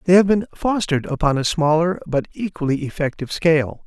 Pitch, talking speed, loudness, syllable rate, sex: 160 Hz, 170 wpm, -20 LUFS, 6.0 syllables/s, male